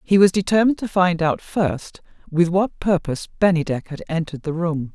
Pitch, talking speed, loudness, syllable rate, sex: 175 Hz, 180 wpm, -20 LUFS, 5.4 syllables/s, female